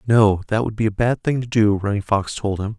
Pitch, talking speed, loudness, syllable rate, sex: 105 Hz, 280 wpm, -20 LUFS, 5.5 syllables/s, male